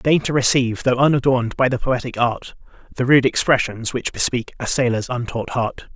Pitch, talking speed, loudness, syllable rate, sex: 125 Hz, 180 wpm, -19 LUFS, 5.2 syllables/s, male